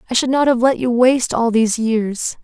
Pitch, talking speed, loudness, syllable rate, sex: 240 Hz, 245 wpm, -16 LUFS, 5.5 syllables/s, female